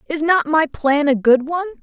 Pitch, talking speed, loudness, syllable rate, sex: 305 Hz, 230 wpm, -16 LUFS, 5.4 syllables/s, female